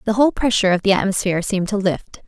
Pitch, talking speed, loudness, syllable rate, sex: 200 Hz, 235 wpm, -18 LUFS, 7.6 syllables/s, female